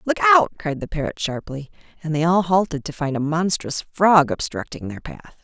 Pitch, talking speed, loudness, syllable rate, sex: 165 Hz, 200 wpm, -20 LUFS, 5.0 syllables/s, female